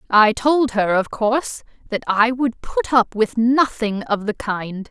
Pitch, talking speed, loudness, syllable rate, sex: 225 Hz, 185 wpm, -19 LUFS, 3.9 syllables/s, female